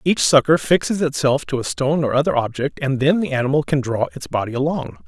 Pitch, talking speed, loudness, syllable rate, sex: 140 Hz, 225 wpm, -19 LUFS, 6.0 syllables/s, male